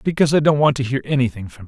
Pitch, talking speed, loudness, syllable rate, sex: 135 Hz, 320 wpm, -18 LUFS, 8.0 syllables/s, male